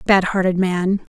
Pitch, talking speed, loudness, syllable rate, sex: 185 Hz, 155 wpm, -18 LUFS, 4.0 syllables/s, female